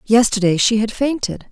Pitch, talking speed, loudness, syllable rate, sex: 220 Hz, 160 wpm, -17 LUFS, 5.0 syllables/s, female